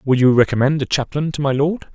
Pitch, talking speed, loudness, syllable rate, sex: 140 Hz, 245 wpm, -17 LUFS, 5.8 syllables/s, male